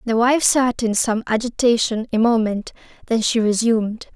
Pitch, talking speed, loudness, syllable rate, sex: 230 Hz, 160 wpm, -19 LUFS, 4.8 syllables/s, female